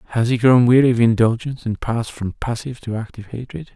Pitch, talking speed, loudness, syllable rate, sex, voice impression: 120 Hz, 210 wpm, -18 LUFS, 6.7 syllables/s, male, masculine, adult-like, slightly halting, slightly refreshing, sincere, slightly calm